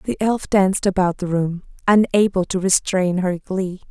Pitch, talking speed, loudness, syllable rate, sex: 190 Hz, 170 wpm, -19 LUFS, 4.5 syllables/s, female